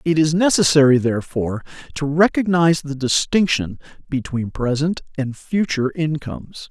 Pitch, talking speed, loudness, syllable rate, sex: 150 Hz, 115 wpm, -19 LUFS, 5.1 syllables/s, male